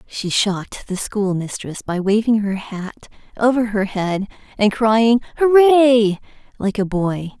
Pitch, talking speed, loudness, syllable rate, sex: 215 Hz, 140 wpm, -18 LUFS, 3.8 syllables/s, female